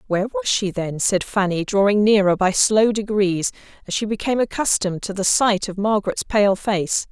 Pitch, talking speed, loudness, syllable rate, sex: 205 Hz, 185 wpm, -19 LUFS, 5.2 syllables/s, female